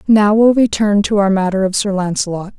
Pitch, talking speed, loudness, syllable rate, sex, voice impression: 200 Hz, 230 wpm, -14 LUFS, 5.4 syllables/s, female, very feminine, very adult-like, thin, tensed, slightly powerful, slightly dark, soft, slightly muffled, fluent, slightly raspy, cute, very intellectual, refreshing, very sincere, very calm, very friendly, reassuring, unique, very elegant, slightly wild, sweet, slightly lively, very kind, modest, slightly light